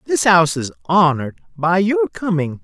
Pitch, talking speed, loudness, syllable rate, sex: 150 Hz, 160 wpm, -17 LUFS, 5.1 syllables/s, male